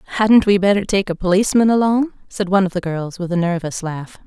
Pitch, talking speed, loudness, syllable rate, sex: 190 Hz, 225 wpm, -17 LUFS, 6.4 syllables/s, female